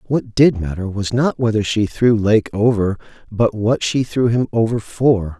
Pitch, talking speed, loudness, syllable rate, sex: 110 Hz, 190 wpm, -17 LUFS, 4.3 syllables/s, male